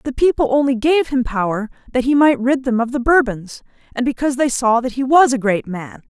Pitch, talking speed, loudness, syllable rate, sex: 255 Hz, 235 wpm, -17 LUFS, 5.5 syllables/s, female